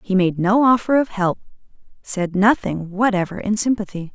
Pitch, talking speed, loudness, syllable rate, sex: 200 Hz, 160 wpm, -19 LUFS, 5.0 syllables/s, female